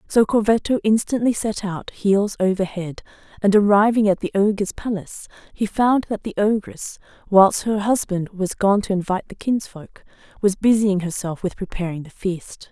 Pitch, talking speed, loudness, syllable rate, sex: 200 Hz, 165 wpm, -20 LUFS, 4.9 syllables/s, female